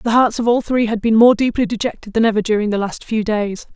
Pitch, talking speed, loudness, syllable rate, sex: 220 Hz, 270 wpm, -17 LUFS, 6.0 syllables/s, female